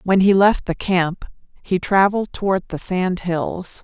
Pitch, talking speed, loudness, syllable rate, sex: 185 Hz, 170 wpm, -19 LUFS, 4.1 syllables/s, female